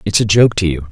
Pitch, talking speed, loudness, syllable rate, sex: 95 Hz, 330 wpm, -13 LUFS, 6.3 syllables/s, male